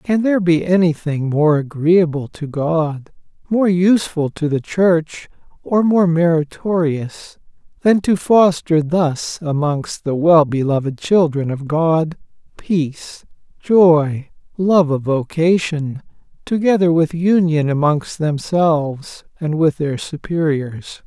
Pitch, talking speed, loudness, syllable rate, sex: 160 Hz, 115 wpm, -17 LUFS, 3.7 syllables/s, male